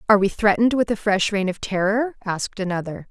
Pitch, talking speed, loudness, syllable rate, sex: 205 Hz, 210 wpm, -21 LUFS, 6.3 syllables/s, female